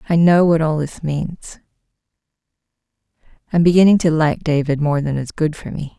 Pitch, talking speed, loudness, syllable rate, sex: 160 Hz, 170 wpm, -17 LUFS, 5.1 syllables/s, female